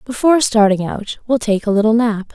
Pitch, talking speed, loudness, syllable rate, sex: 220 Hz, 205 wpm, -15 LUFS, 5.6 syllables/s, female